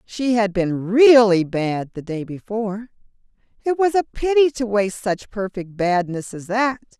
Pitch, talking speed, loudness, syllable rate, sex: 215 Hz, 165 wpm, -20 LUFS, 4.5 syllables/s, female